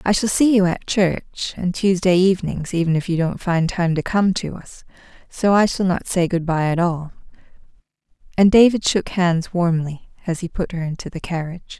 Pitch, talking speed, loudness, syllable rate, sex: 180 Hz, 205 wpm, -19 LUFS, 5.0 syllables/s, female